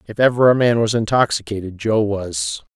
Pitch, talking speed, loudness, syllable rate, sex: 110 Hz, 175 wpm, -18 LUFS, 5.2 syllables/s, male